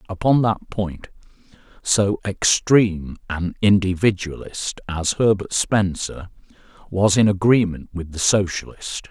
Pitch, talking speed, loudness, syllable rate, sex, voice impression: 95 Hz, 105 wpm, -20 LUFS, 4.0 syllables/s, male, very masculine, very adult-like, old, very thick, tensed, very powerful, slightly bright, soft, muffled, fluent, raspy, very cool, very intellectual, very sincere, very calm, very mature, friendly, very reassuring, unique, elegant, very wild, sweet, lively, very kind, slightly intense, slightly modest